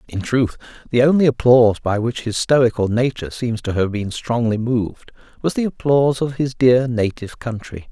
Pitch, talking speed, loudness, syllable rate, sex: 120 Hz, 180 wpm, -18 LUFS, 5.2 syllables/s, male